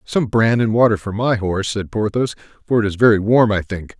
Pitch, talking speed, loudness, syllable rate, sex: 110 Hz, 240 wpm, -17 LUFS, 5.6 syllables/s, male